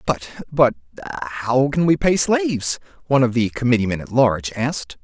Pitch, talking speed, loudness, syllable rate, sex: 125 Hz, 165 wpm, -19 LUFS, 5.6 syllables/s, male